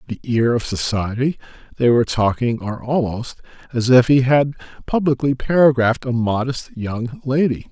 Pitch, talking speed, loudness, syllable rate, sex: 125 Hz, 140 wpm, -18 LUFS, 4.9 syllables/s, male